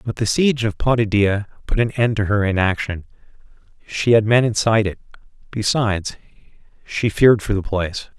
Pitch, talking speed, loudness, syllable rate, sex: 110 Hz, 160 wpm, -19 LUFS, 5.6 syllables/s, male